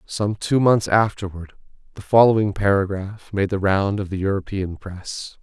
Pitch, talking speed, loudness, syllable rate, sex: 100 Hz, 155 wpm, -20 LUFS, 4.6 syllables/s, male